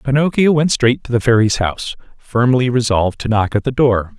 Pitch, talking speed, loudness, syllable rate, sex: 120 Hz, 200 wpm, -15 LUFS, 5.5 syllables/s, male